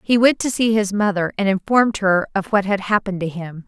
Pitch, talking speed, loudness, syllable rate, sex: 200 Hz, 245 wpm, -18 LUFS, 5.7 syllables/s, female